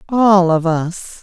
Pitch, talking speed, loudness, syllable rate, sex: 185 Hz, 145 wpm, -14 LUFS, 2.9 syllables/s, female